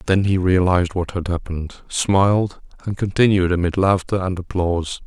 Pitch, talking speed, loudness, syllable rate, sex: 90 Hz, 155 wpm, -19 LUFS, 5.2 syllables/s, male